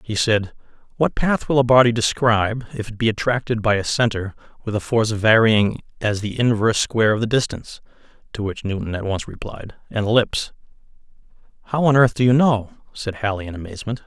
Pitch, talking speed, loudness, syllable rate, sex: 110 Hz, 190 wpm, -20 LUFS, 6.0 syllables/s, male